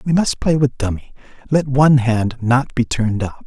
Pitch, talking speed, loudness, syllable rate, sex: 130 Hz, 210 wpm, -17 LUFS, 5.1 syllables/s, male